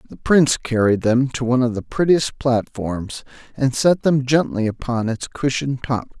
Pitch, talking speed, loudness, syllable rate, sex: 125 Hz, 175 wpm, -19 LUFS, 4.8 syllables/s, male